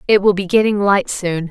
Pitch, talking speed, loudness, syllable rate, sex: 195 Hz, 240 wpm, -15 LUFS, 5.2 syllables/s, female